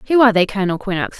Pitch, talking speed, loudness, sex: 210 Hz, 250 wpm, -16 LUFS, female